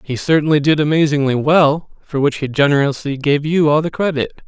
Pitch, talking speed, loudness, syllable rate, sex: 145 Hz, 190 wpm, -16 LUFS, 5.6 syllables/s, male